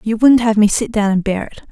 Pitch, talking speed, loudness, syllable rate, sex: 215 Hz, 315 wpm, -14 LUFS, 5.7 syllables/s, female